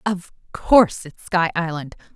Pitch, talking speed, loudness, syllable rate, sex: 175 Hz, 140 wpm, -19 LUFS, 4.5 syllables/s, female